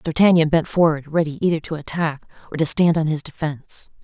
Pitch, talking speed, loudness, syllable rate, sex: 160 Hz, 195 wpm, -19 LUFS, 5.9 syllables/s, female